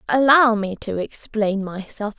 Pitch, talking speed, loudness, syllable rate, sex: 220 Hz, 135 wpm, -19 LUFS, 4.0 syllables/s, female